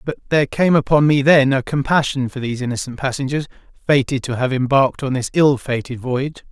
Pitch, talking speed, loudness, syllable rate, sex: 135 Hz, 195 wpm, -18 LUFS, 6.0 syllables/s, male